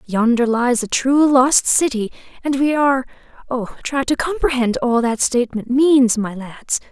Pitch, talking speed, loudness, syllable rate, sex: 250 Hz, 155 wpm, -17 LUFS, 4.4 syllables/s, female